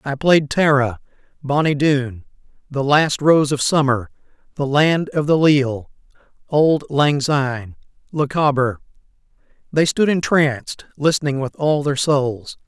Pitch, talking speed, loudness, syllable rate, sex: 145 Hz, 130 wpm, -18 LUFS, 4.0 syllables/s, male